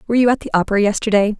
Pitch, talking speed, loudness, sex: 215 Hz, 260 wpm, -16 LUFS, female